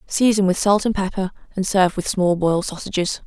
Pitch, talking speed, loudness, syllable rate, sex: 190 Hz, 200 wpm, -20 LUFS, 5.9 syllables/s, female